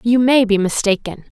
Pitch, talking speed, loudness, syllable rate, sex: 220 Hz, 170 wpm, -15 LUFS, 5.1 syllables/s, female